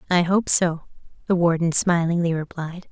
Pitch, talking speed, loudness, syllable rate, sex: 170 Hz, 145 wpm, -21 LUFS, 4.8 syllables/s, female